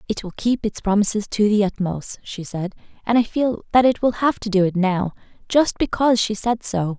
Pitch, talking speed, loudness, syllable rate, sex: 210 Hz, 225 wpm, -20 LUFS, 5.2 syllables/s, female